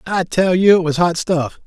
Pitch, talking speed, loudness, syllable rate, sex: 175 Hz, 250 wpm, -16 LUFS, 4.6 syllables/s, male